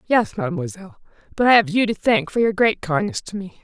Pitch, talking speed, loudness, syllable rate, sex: 210 Hz, 230 wpm, -19 LUFS, 6.1 syllables/s, female